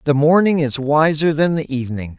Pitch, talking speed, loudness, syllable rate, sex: 145 Hz, 190 wpm, -16 LUFS, 5.4 syllables/s, male